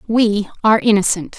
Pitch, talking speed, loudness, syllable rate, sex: 210 Hz, 130 wpm, -15 LUFS, 5.5 syllables/s, female